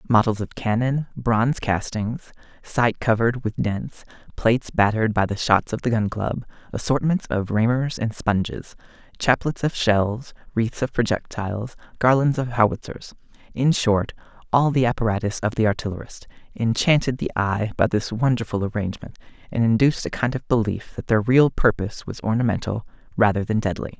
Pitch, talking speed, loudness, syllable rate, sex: 115 Hz, 155 wpm, -22 LUFS, 5.2 syllables/s, male